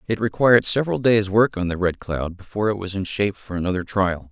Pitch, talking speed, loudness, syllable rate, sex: 100 Hz, 235 wpm, -21 LUFS, 6.3 syllables/s, male